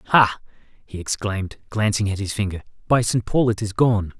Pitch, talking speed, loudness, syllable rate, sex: 105 Hz, 185 wpm, -21 LUFS, 4.9 syllables/s, male